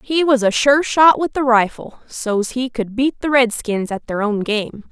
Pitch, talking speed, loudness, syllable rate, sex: 245 Hz, 220 wpm, -17 LUFS, 4.3 syllables/s, female